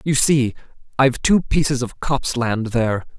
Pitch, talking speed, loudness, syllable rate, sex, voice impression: 130 Hz, 170 wpm, -19 LUFS, 5.1 syllables/s, male, masculine, slightly young, slightly adult-like, slightly thick, very tensed, powerful, bright, hard, very clear, fluent, cool, slightly intellectual, very refreshing, sincere, slightly calm, friendly, reassuring, wild, lively, strict, intense